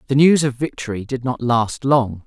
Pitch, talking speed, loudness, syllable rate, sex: 125 Hz, 210 wpm, -18 LUFS, 4.9 syllables/s, male